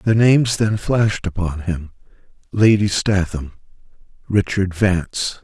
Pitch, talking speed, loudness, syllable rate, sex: 100 Hz, 90 wpm, -18 LUFS, 4.2 syllables/s, male